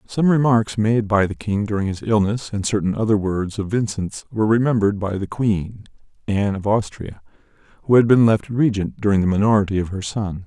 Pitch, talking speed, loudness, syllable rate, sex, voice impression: 105 Hz, 195 wpm, -19 LUFS, 5.5 syllables/s, male, masculine, adult-like, soft, sincere, very calm, slightly sweet, kind